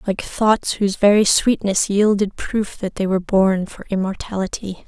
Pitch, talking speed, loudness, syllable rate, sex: 200 Hz, 160 wpm, -19 LUFS, 4.7 syllables/s, female